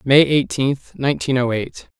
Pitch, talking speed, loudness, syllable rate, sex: 135 Hz, 150 wpm, -18 LUFS, 4.4 syllables/s, male